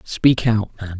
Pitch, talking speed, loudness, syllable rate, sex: 105 Hz, 180 wpm, -18 LUFS, 3.9 syllables/s, male